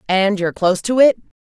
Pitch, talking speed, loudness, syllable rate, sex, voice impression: 205 Hz, 210 wpm, -16 LUFS, 7.0 syllables/s, female, feminine, adult-like, tensed, powerful, hard, nasal, intellectual, unique, slightly wild, lively, slightly intense, sharp